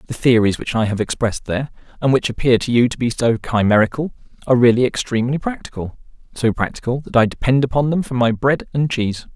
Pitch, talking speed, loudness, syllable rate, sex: 125 Hz, 200 wpm, -18 LUFS, 6.4 syllables/s, male